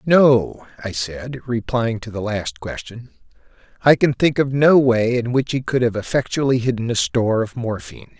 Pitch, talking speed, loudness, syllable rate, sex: 120 Hz, 185 wpm, -19 LUFS, 4.9 syllables/s, male